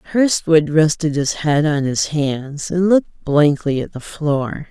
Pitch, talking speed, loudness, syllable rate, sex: 150 Hz, 165 wpm, -17 LUFS, 3.8 syllables/s, female